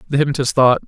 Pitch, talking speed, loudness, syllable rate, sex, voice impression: 135 Hz, 205 wpm, -16 LUFS, 8.9 syllables/s, male, masculine, middle-aged, thick, powerful, hard, slightly halting, mature, wild, lively, strict